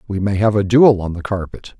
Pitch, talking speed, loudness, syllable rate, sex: 100 Hz, 265 wpm, -16 LUFS, 5.5 syllables/s, male